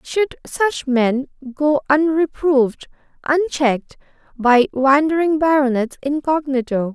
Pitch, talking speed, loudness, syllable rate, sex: 285 Hz, 85 wpm, -18 LUFS, 3.9 syllables/s, female